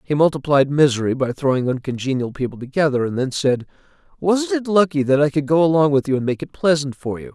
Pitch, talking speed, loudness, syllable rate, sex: 140 Hz, 220 wpm, -19 LUFS, 6.1 syllables/s, male